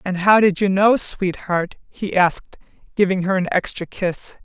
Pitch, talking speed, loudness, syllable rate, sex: 190 Hz, 175 wpm, -18 LUFS, 4.5 syllables/s, female